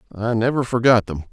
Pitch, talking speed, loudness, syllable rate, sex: 115 Hz, 180 wpm, -19 LUFS, 6.1 syllables/s, male